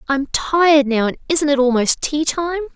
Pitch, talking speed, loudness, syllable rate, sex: 290 Hz, 195 wpm, -17 LUFS, 4.7 syllables/s, female